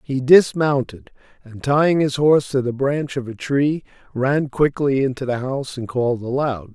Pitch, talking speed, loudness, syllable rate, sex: 135 Hz, 180 wpm, -19 LUFS, 4.8 syllables/s, male